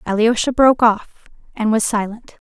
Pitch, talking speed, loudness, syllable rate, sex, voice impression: 225 Hz, 145 wpm, -16 LUFS, 4.9 syllables/s, female, feminine, slightly adult-like, slightly powerful, slightly cute, refreshing, slightly unique